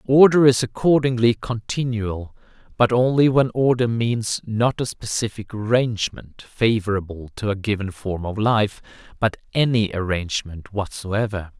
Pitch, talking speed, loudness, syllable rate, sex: 110 Hz, 125 wpm, -21 LUFS, 4.5 syllables/s, male